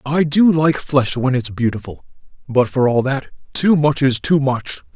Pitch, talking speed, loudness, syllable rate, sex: 135 Hz, 195 wpm, -17 LUFS, 4.5 syllables/s, male